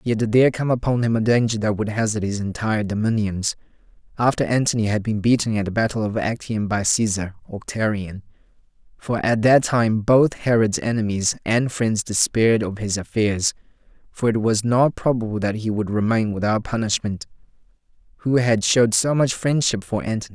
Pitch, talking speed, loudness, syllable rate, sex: 110 Hz, 175 wpm, -20 LUFS, 5.4 syllables/s, male